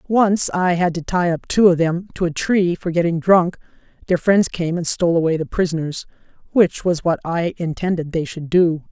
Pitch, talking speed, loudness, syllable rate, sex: 175 Hz, 200 wpm, -19 LUFS, 5.0 syllables/s, female